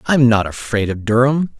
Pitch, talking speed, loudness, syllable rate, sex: 120 Hz, 225 wpm, -16 LUFS, 5.5 syllables/s, male